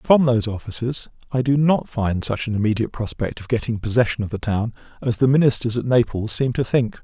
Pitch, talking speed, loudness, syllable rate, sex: 115 Hz, 215 wpm, -21 LUFS, 5.9 syllables/s, male